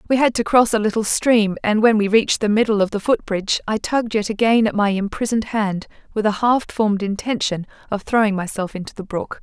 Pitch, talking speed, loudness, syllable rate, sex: 215 Hz, 230 wpm, -19 LUFS, 5.9 syllables/s, female